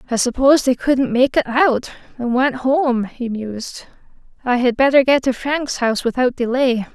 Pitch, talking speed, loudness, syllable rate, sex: 255 Hz, 180 wpm, -17 LUFS, 4.8 syllables/s, female